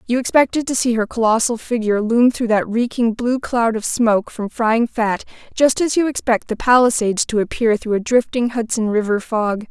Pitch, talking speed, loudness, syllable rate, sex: 230 Hz, 200 wpm, -18 LUFS, 5.2 syllables/s, female